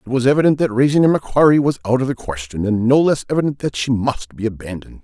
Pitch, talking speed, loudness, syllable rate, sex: 125 Hz, 250 wpm, -17 LUFS, 6.5 syllables/s, male